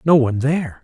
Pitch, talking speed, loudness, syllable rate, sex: 140 Hz, 215 wpm, -18 LUFS, 7.0 syllables/s, male